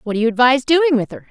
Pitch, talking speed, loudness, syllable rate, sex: 250 Hz, 320 wpm, -15 LUFS, 7.5 syllables/s, female